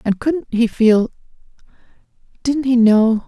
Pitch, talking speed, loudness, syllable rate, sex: 240 Hz, 110 wpm, -16 LUFS, 3.8 syllables/s, female